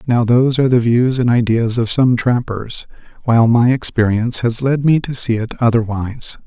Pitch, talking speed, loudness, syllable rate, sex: 120 Hz, 185 wpm, -15 LUFS, 5.3 syllables/s, male